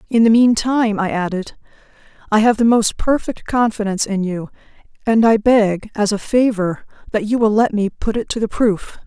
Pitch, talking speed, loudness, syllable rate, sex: 215 Hz, 200 wpm, -17 LUFS, 4.9 syllables/s, female